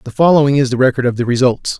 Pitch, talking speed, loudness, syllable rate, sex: 130 Hz, 265 wpm, -13 LUFS, 7.2 syllables/s, male